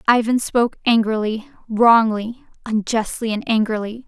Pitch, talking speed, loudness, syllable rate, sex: 225 Hz, 105 wpm, -19 LUFS, 4.6 syllables/s, female